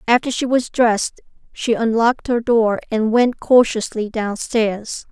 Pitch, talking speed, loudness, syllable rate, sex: 230 Hz, 140 wpm, -18 LUFS, 4.2 syllables/s, female